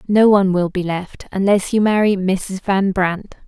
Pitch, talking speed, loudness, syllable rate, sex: 195 Hz, 190 wpm, -17 LUFS, 4.5 syllables/s, female